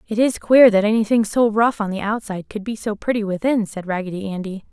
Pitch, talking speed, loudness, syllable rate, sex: 210 Hz, 230 wpm, -19 LUFS, 6.0 syllables/s, female